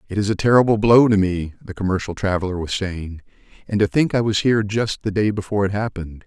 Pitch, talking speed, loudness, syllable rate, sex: 100 Hz, 230 wpm, -19 LUFS, 6.4 syllables/s, male